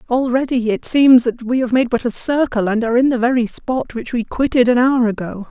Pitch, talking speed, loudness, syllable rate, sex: 245 Hz, 240 wpm, -16 LUFS, 5.4 syllables/s, female